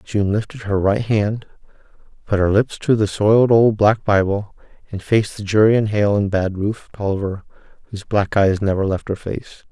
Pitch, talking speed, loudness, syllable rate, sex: 105 Hz, 190 wpm, -18 LUFS, 5.3 syllables/s, male